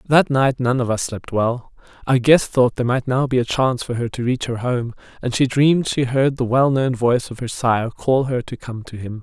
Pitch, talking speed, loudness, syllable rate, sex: 125 Hz, 255 wpm, -19 LUFS, 5.2 syllables/s, male